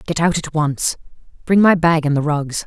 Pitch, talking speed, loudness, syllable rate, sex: 160 Hz, 225 wpm, -17 LUFS, 4.9 syllables/s, female